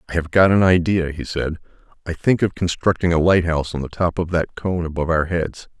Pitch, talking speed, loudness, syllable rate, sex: 85 Hz, 230 wpm, -19 LUFS, 5.8 syllables/s, male